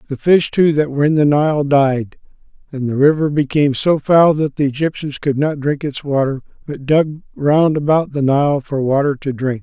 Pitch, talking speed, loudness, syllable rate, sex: 145 Hz, 205 wpm, -16 LUFS, 4.9 syllables/s, male